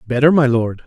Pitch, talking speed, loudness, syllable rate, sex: 130 Hz, 210 wpm, -15 LUFS, 5.6 syllables/s, male